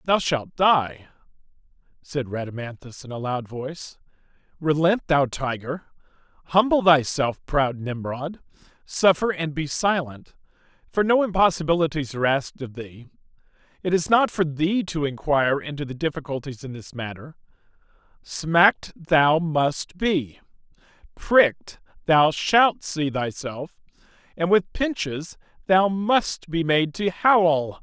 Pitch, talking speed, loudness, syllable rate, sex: 155 Hz, 125 wpm, -22 LUFS, 4.2 syllables/s, male